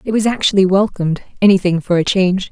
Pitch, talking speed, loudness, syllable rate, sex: 190 Hz, 190 wpm, -15 LUFS, 6.8 syllables/s, female